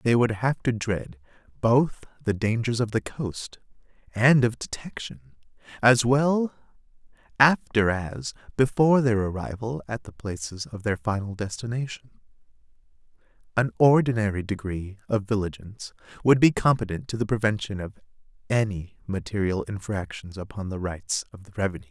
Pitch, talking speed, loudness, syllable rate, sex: 110 Hz, 135 wpm, -25 LUFS, 4.9 syllables/s, male